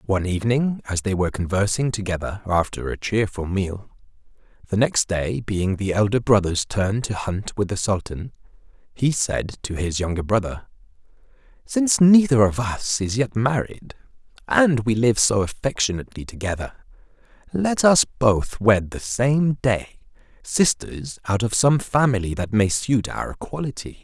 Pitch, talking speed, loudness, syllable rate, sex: 110 Hz, 150 wpm, -21 LUFS, 4.6 syllables/s, male